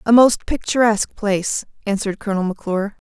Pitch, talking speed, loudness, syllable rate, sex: 210 Hz, 135 wpm, -19 LUFS, 6.7 syllables/s, female